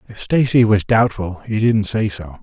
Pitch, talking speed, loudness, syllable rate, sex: 105 Hz, 220 wpm, -17 LUFS, 4.9 syllables/s, male